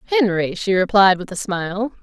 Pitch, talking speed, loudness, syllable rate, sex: 195 Hz, 175 wpm, -18 LUFS, 5.3 syllables/s, female